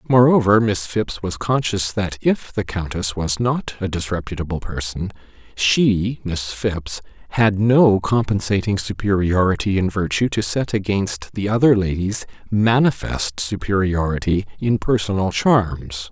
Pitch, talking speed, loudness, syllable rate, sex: 100 Hz, 125 wpm, -19 LUFS, 4.2 syllables/s, male